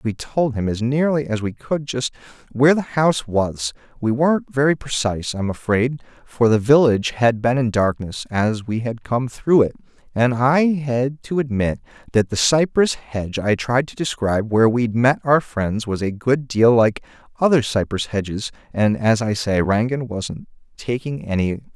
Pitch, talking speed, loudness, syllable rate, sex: 120 Hz, 175 wpm, -19 LUFS, 4.7 syllables/s, male